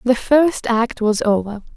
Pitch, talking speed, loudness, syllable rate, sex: 235 Hz, 170 wpm, -17 LUFS, 3.9 syllables/s, female